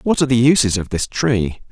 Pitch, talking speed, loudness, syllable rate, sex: 120 Hz, 245 wpm, -16 LUFS, 5.8 syllables/s, male